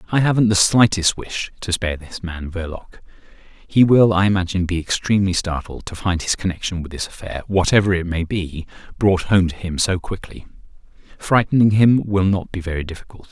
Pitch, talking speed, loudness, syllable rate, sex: 95 Hz, 185 wpm, -19 LUFS, 5.7 syllables/s, male